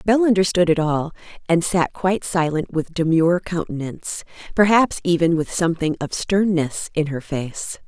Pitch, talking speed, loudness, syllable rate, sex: 170 Hz, 145 wpm, -20 LUFS, 4.9 syllables/s, female